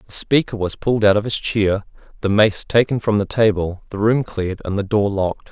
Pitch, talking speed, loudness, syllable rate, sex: 105 Hz, 230 wpm, -19 LUFS, 5.4 syllables/s, male